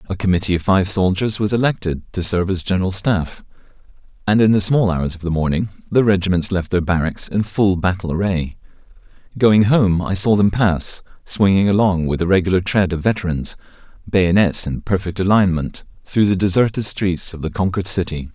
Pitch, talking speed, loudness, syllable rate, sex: 95 Hz, 180 wpm, -18 LUFS, 5.4 syllables/s, male